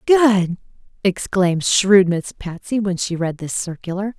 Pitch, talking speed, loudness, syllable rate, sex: 190 Hz, 145 wpm, -18 LUFS, 4.2 syllables/s, female